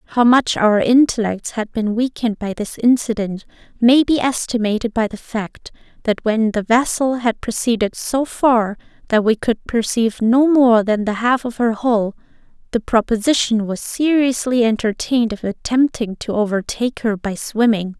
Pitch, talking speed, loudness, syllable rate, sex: 230 Hz, 160 wpm, -17 LUFS, 4.8 syllables/s, female